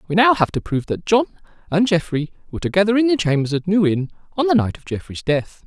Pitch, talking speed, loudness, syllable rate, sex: 185 Hz, 245 wpm, -19 LUFS, 6.4 syllables/s, male